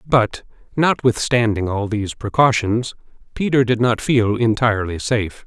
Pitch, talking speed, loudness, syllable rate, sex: 115 Hz, 120 wpm, -18 LUFS, 4.7 syllables/s, male